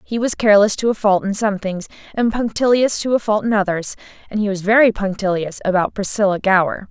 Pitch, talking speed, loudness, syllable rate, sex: 205 Hz, 210 wpm, -17 LUFS, 5.8 syllables/s, female